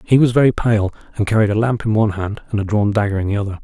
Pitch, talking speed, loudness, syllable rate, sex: 105 Hz, 295 wpm, -17 LUFS, 7.1 syllables/s, male